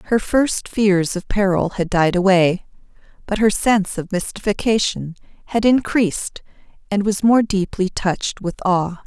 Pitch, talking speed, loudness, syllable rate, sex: 195 Hz, 145 wpm, -18 LUFS, 4.5 syllables/s, female